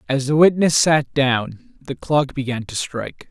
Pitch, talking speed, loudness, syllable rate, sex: 140 Hz, 180 wpm, -18 LUFS, 4.5 syllables/s, male